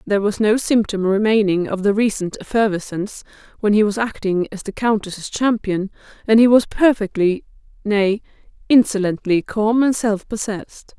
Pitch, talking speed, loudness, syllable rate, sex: 210 Hz, 140 wpm, -18 LUFS, 5.0 syllables/s, female